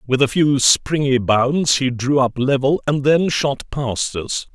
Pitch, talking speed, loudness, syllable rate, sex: 135 Hz, 185 wpm, -17 LUFS, 3.8 syllables/s, male